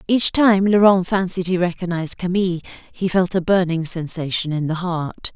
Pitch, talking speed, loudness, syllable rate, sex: 180 Hz, 170 wpm, -19 LUFS, 5.1 syllables/s, female